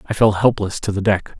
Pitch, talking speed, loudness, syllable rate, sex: 105 Hz, 260 wpm, -18 LUFS, 5.7 syllables/s, male